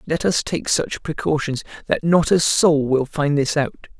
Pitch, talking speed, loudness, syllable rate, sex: 150 Hz, 195 wpm, -19 LUFS, 4.3 syllables/s, male